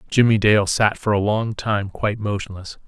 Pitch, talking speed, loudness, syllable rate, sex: 105 Hz, 190 wpm, -20 LUFS, 5.0 syllables/s, male